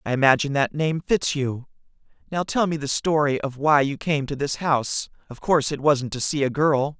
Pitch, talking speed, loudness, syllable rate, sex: 145 Hz, 225 wpm, -22 LUFS, 5.3 syllables/s, male